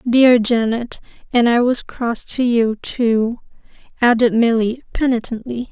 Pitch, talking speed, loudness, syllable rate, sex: 235 Hz, 115 wpm, -17 LUFS, 4.0 syllables/s, female